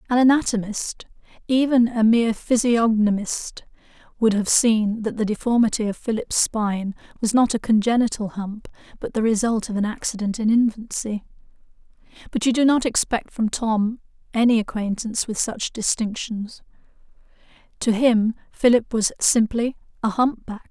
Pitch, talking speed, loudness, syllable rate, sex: 225 Hz, 135 wpm, -21 LUFS, 4.9 syllables/s, female